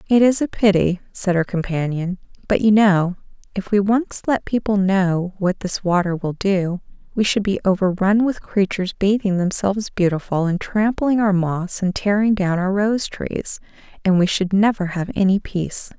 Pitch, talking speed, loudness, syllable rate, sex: 195 Hz, 175 wpm, -19 LUFS, 4.7 syllables/s, female